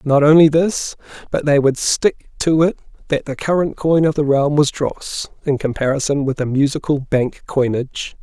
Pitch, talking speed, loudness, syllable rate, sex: 145 Hz, 180 wpm, -17 LUFS, 4.8 syllables/s, male